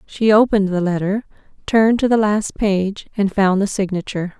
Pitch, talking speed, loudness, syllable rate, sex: 200 Hz, 175 wpm, -17 LUFS, 5.4 syllables/s, female